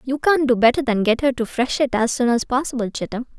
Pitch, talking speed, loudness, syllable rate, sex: 250 Hz, 250 wpm, -19 LUFS, 6.0 syllables/s, female